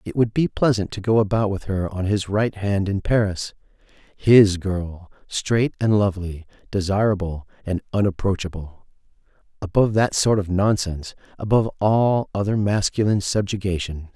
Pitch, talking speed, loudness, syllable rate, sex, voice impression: 100 Hz, 135 wpm, -21 LUFS, 5.0 syllables/s, male, masculine, middle-aged, slightly relaxed, powerful, slightly hard, raspy, cool, intellectual, calm, mature, reassuring, wild, lively, slightly kind, slightly modest